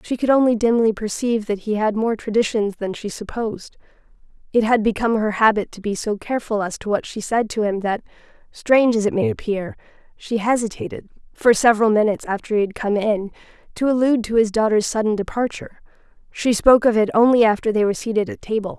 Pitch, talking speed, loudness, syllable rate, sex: 220 Hz, 200 wpm, -19 LUFS, 6.2 syllables/s, female